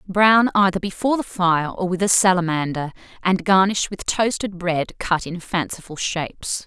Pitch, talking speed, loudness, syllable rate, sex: 185 Hz, 160 wpm, -20 LUFS, 4.7 syllables/s, female